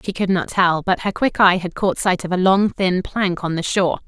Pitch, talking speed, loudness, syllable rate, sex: 185 Hz, 280 wpm, -18 LUFS, 5.2 syllables/s, female